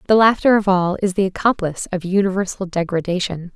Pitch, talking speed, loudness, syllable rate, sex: 190 Hz, 170 wpm, -18 LUFS, 6.1 syllables/s, female